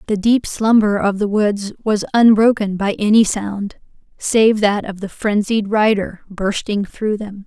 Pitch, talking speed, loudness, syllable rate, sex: 210 Hz, 160 wpm, -17 LUFS, 4.1 syllables/s, female